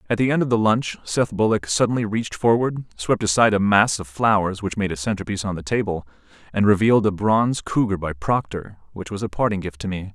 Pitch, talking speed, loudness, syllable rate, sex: 105 Hz, 225 wpm, -21 LUFS, 6.1 syllables/s, male